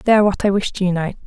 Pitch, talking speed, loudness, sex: 195 Hz, 330 wpm, -18 LUFS, female